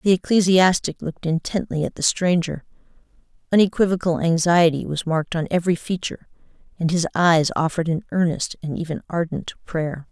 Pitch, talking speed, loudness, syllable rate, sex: 170 Hz, 140 wpm, -21 LUFS, 5.7 syllables/s, female